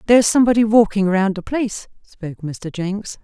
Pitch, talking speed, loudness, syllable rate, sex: 205 Hz, 165 wpm, -18 LUFS, 6.0 syllables/s, female